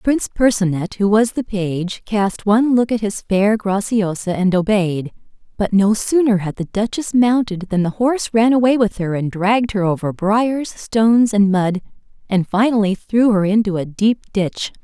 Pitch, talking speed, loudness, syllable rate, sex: 205 Hz, 180 wpm, -17 LUFS, 4.6 syllables/s, female